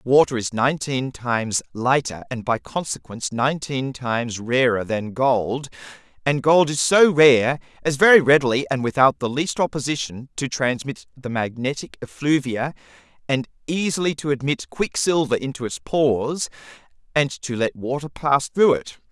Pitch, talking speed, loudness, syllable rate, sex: 135 Hz, 145 wpm, -21 LUFS, 4.8 syllables/s, male